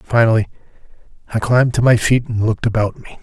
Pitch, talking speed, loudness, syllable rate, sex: 115 Hz, 185 wpm, -16 LUFS, 6.5 syllables/s, male